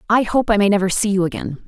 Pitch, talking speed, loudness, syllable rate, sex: 205 Hz, 285 wpm, -17 LUFS, 6.7 syllables/s, female